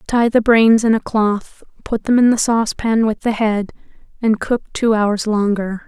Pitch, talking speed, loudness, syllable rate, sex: 220 Hz, 195 wpm, -16 LUFS, 4.4 syllables/s, female